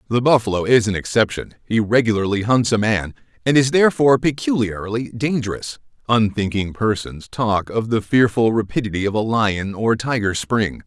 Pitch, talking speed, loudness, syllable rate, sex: 110 Hz, 155 wpm, -19 LUFS, 5.2 syllables/s, male